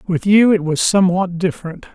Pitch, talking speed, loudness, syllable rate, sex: 185 Hz, 185 wpm, -15 LUFS, 5.8 syllables/s, male